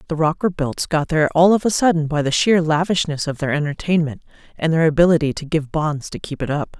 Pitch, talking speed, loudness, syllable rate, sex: 160 Hz, 220 wpm, -19 LUFS, 6.0 syllables/s, female